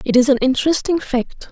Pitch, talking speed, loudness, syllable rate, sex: 270 Hz, 200 wpm, -17 LUFS, 5.9 syllables/s, female